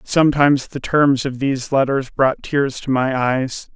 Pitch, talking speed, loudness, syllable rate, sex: 135 Hz, 175 wpm, -18 LUFS, 4.4 syllables/s, male